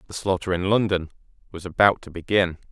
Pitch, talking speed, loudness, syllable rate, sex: 90 Hz, 175 wpm, -22 LUFS, 5.9 syllables/s, male